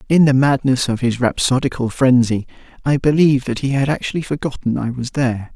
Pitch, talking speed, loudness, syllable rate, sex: 130 Hz, 185 wpm, -17 LUFS, 5.8 syllables/s, male